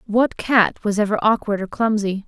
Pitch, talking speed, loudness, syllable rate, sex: 210 Hz, 185 wpm, -19 LUFS, 5.0 syllables/s, female